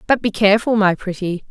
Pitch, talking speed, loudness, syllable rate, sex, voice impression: 205 Hz, 200 wpm, -17 LUFS, 6.1 syllables/s, female, very feminine, adult-like, slightly middle-aged, very thin, very tensed, powerful, bright, hard, very clear, very fluent, cool, intellectual, refreshing, very sincere, slightly calm, friendly, reassuring, very unique, slightly elegant, slightly wild, slightly sweet, very lively, slightly kind, sharp